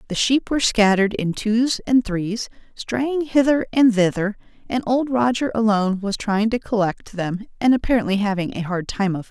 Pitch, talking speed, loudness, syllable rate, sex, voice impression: 220 Hz, 185 wpm, -20 LUFS, 5.1 syllables/s, female, feminine, adult-like, tensed, bright, slightly soft, clear, fluent, slightly intellectual, calm, friendly, reassuring, elegant, kind